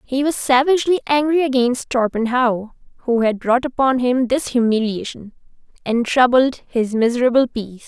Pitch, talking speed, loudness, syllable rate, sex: 250 Hz, 135 wpm, -18 LUFS, 5.0 syllables/s, female